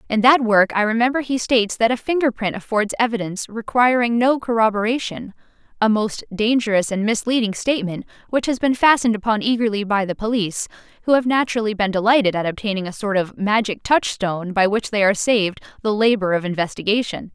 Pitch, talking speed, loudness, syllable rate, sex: 220 Hz, 175 wpm, -19 LUFS, 6.2 syllables/s, female